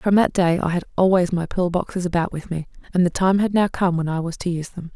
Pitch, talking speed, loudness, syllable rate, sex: 175 Hz, 290 wpm, -21 LUFS, 6.2 syllables/s, female